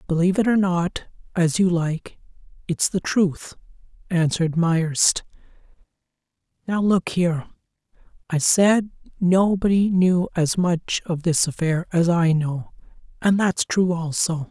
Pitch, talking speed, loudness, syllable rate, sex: 175 Hz, 120 wpm, -21 LUFS, 4.0 syllables/s, male